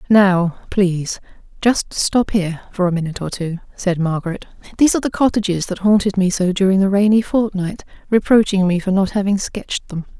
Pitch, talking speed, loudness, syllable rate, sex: 195 Hz, 180 wpm, -17 LUFS, 5.7 syllables/s, female